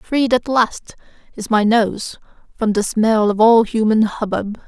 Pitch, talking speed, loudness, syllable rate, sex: 220 Hz, 165 wpm, -16 LUFS, 3.9 syllables/s, female